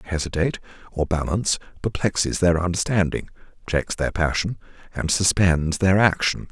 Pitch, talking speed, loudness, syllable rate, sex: 90 Hz, 130 wpm, -22 LUFS, 5.2 syllables/s, male